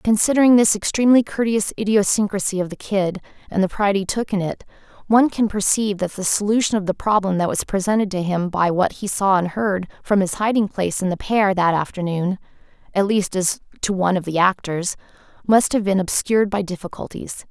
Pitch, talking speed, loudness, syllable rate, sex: 200 Hz, 200 wpm, -19 LUFS, 5.3 syllables/s, female